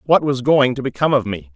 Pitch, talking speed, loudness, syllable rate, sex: 130 Hz, 270 wpm, -17 LUFS, 6.4 syllables/s, male